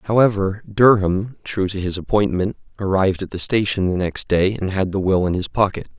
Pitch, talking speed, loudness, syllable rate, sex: 100 Hz, 200 wpm, -19 LUFS, 5.2 syllables/s, male